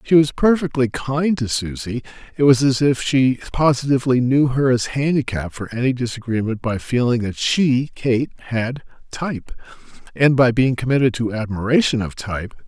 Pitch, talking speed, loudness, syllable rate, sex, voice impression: 130 Hz, 160 wpm, -19 LUFS, 5.2 syllables/s, male, masculine, slightly middle-aged, thick, tensed, slightly hard, clear, calm, mature, slightly wild, kind, slightly strict